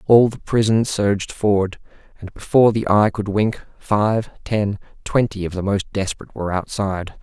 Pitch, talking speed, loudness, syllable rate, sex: 105 Hz, 165 wpm, -19 LUFS, 5.2 syllables/s, male